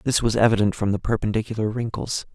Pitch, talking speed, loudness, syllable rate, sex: 110 Hz, 180 wpm, -23 LUFS, 6.5 syllables/s, male